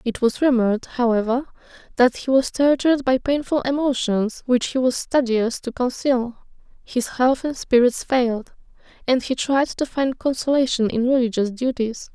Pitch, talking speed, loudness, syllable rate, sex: 250 Hz, 155 wpm, -20 LUFS, 4.8 syllables/s, female